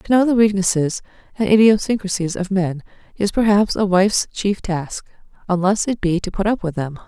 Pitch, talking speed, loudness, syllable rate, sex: 195 Hz, 185 wpm, -18 LUFS, 5.3 syllables/s, female